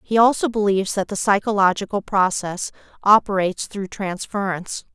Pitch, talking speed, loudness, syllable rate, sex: 200 Hz, 120 wpm, -20 LUFS, 5.4 syllables/s, female